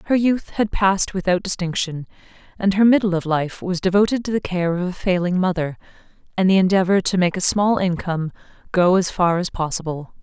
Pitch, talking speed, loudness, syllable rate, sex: 185 Hz, 195 wpm, -20 LUFS, 5.7 syllables/s, female